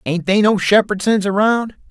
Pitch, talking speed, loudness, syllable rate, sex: 205 Hz, 160 wpm, -15 LUFS, 4.7 syllables/s, male